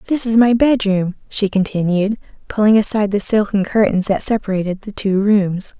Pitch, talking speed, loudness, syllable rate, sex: 205 Hz, 165 wpm, -16 LUFS, 5.2 syllables/s, female